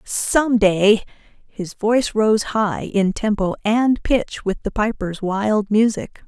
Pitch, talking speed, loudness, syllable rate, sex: 210 Hz, 135 wpm, -19 LUFS, 3.5 syllables/s, female